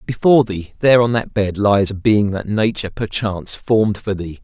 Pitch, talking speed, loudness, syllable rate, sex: 105 Hz, 205 wpm, -17 LUFS, 5.5 syllables/s, male